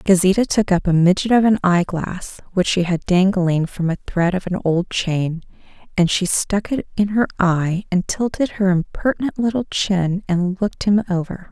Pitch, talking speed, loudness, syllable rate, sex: 190 Hz, 190 wpm, -19 LUFS, 4.7 syllables/s, female